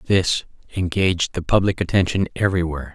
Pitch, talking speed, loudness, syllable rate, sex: 90 Hz, 120 wpm, -21 LUFS, 5.5 syllables/s, male